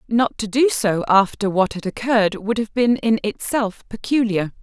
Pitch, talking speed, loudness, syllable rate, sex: 220 Hz, 180 wpm, -19 LUFS, 4.6 syllables/s, female